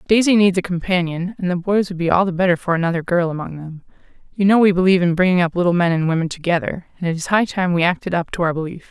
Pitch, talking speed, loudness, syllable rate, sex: 175 Hz, 270 wpm, -18 LUFS, 6.9 syllables/s, female